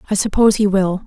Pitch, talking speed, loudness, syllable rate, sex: 200 Hz, 225 wpm, -15 LUFS, 7.1 syllables/s, female